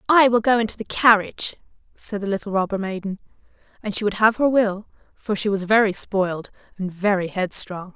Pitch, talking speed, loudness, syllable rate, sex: 205 Hz, 190 wpm, -21 LUFS, 5.6 syllables/s, female